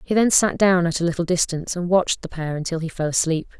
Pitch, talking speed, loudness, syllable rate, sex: 175 Hz, 265 wpm, -21 LUFS, 6.5 syllables/s, female